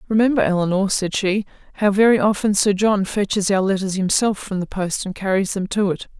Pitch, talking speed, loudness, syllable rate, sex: 200 Hz, 205 wpm, -19 LUFS, 5.6 syllables/s, female